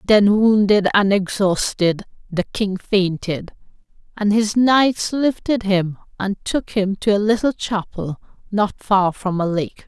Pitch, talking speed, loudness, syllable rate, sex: 200 Hz, 145 wpm, -19 LUFS, 3.7 syllables/s, female